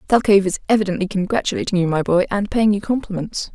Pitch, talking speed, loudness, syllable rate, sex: 200 Hz, 185 wpm, -19 LUFS, 6.9 syllables/s, female